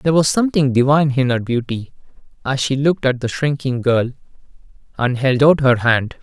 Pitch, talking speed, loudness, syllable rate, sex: 135 Hz, 185 wpm, -17 LUFS, 5.7 syllables/s, male